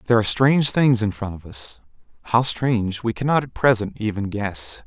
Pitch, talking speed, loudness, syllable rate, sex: 110 Hz, 185 wpm, -20 LUFS, 5.5 syllables/s, male